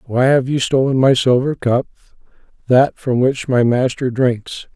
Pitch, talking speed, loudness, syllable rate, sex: 130 Hz, 165 wpm, -16 LUFS, 4.3 syllables/s, male